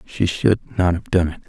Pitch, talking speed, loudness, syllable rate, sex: 90 Hz, 245 wpm, -20 LUFS, 4.4 syllables/s, male